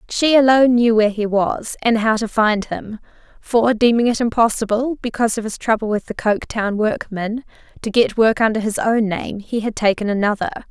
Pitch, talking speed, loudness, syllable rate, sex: 220 Hz, 190 wpm, -18 LUFS, 5.4 syllables/s, female